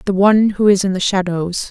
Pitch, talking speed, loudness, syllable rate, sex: 195 Hz, 245 wpm, -15 LUFS, 5.7 syllables/s, female